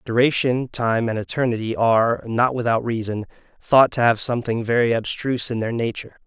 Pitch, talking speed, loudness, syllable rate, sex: 115 Hz, 165 wpm, -20 LUFS, 5.6 syllables/s, male